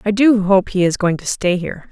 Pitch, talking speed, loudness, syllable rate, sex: 190 Hz, 280 wpm, -16 LUFS, 5.7 syllables/s, female